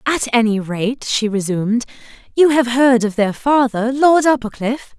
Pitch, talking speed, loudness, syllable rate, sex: 240 Hz, 155 wpm, -16 LUFS, 4.6 syllables/s, female